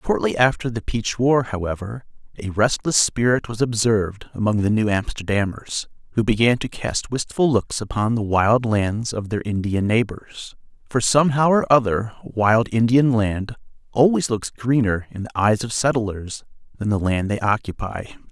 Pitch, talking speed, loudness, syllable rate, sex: 115 Hz, 160 wpm, -20 LUFS, 4.7 syllables/s, male